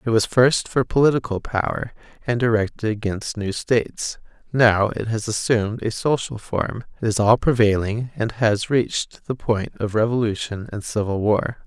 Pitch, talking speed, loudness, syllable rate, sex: 110 Hz, 160 wpm, -21 LUFS, 4.6 syllables/s, male